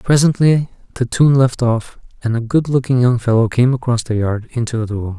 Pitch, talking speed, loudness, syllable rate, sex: 125 Hz, 210 wpm, -16 LUFS, 5.3 syllables/s, male